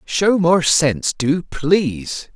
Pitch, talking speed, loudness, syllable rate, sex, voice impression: 160 Hz, 125 wpm, -17 LUFS, 3.2 syllables/s, male, masculine, very adult-like, slightly tensed, slightly powerful, refreshing, slightly kind